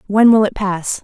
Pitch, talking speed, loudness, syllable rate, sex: 200 Hz, 230 wpm, -14 LUFS, 4.6 syllables/s, female